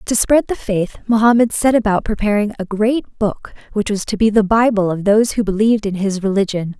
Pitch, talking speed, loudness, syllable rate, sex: 210 Hz, 210 wpm, -16 LUFS, 5.5 syllables/s, female